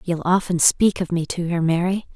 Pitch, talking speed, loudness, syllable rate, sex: 175 Hz, 225 wpm, -20 LUFS, 5.0 syllables/s, female